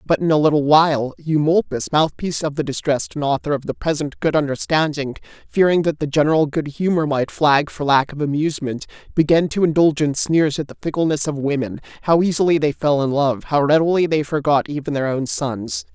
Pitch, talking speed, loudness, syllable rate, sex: 150 Hz, 200 wpm, -19 LUFS, 5.7 syllables/s, male